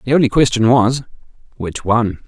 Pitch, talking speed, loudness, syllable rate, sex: 120 Hz, 160 wpm, -15 LUFS, 5.7 syllables/s, male